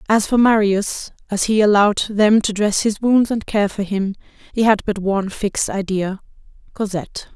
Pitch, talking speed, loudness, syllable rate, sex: 205 Hz, 180 wpm, -18 LUFS, 5.1 syllables/s, female